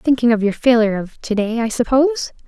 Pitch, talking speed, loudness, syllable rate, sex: 240 Hz, 220 wpm, -17 LUFS, 6.0 syllables/s, female